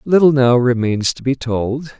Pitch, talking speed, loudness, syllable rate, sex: 130 Hz, 180 wpm, -16 LUFS, 4.4 syllables/s, male